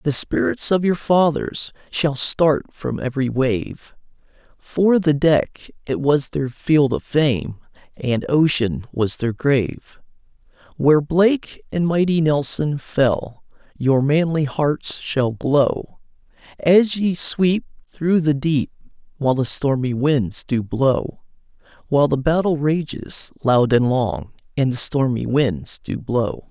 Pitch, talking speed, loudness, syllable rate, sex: 145 Hz, 135 wpm, -19 LUFS, 3.7 syllables/s, male